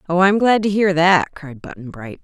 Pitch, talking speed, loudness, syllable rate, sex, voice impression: 175 Hz, 240 wpm, -15 LUFS, 5.1 syllables/s, female, feminine, tensed, slightly powerful, slightly bright, slightly clear, intellectual, slightly elegant, lively